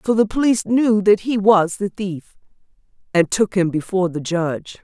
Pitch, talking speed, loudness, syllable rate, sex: 195 Hz, 185 wpm, -18 LUFS, 5.1 syllables/s, female